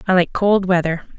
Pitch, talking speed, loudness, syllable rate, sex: 185 Hz, 205 wpm, -17 LUFS, 5.4 syllables/s, female